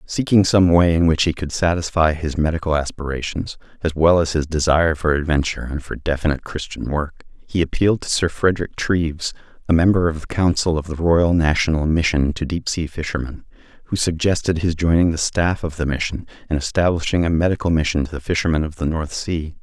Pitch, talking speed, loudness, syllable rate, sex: 80 Hz, 195 wpm, -19 LUFS, 5.8 syllables/s, male